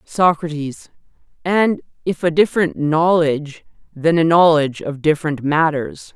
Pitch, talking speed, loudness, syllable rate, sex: 160 Hz, 115 wpm, -17 LUFS, 4.6 syllables/s, male